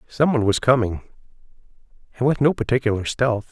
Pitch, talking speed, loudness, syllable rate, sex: 120 Hz, 135 wpm, -20 LUFS, 6.4 syllables/s, male